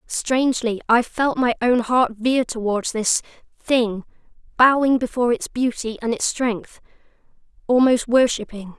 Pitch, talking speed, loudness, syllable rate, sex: 240 Hz, 125 wpm, -20 LUFS, 4.3 syllables/s, female